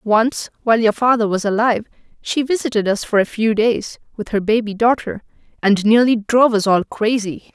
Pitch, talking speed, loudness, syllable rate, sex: 220 Hz, 185 wpm, -17 LUFS, 5.2 syllables/s, female